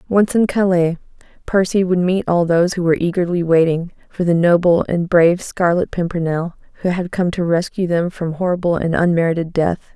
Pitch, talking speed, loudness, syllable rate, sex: 175 Hz, 180 wpm, -17 LUFS, 5.5 syllables/s, female